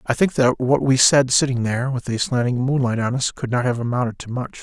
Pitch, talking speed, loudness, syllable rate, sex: 125 Hz, 260 wpm, -19 LUFS, 5.8 syllables/s, male